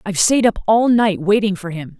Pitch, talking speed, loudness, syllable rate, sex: 200 Hz, 240 wpm, -16 LUFS, 5.6 syllables/s, female